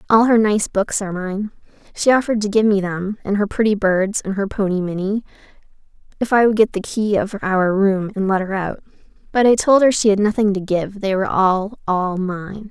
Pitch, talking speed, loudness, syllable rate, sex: 200 Hz, 220 wpm, -18 LUFS, 5.3 syllables/s, female